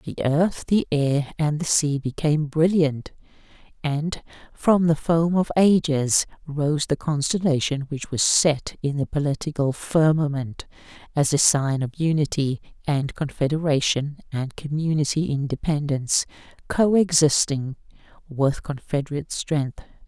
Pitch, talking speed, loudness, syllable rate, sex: 150 Hz, 115 wpm, -22 LUFS, 4.3 syllables/s, female